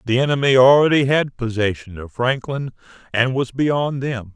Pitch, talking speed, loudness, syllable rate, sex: 125 Hz, 150 wpm, -18 LUFS, 4.8 syllables/s, male